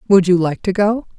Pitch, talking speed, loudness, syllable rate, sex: 190 Hz, 255 wpm, -16 LUFS, 5.4 syllables/s, female